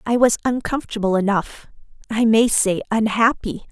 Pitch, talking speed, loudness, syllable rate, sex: 220 Hz, 130 wpm, -19 LUFS, 5.1 syllables/s, female